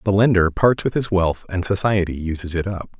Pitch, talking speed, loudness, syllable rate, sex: 95 Hz, 220 wpm, -20 LUFS, 5.5 syllables/s, male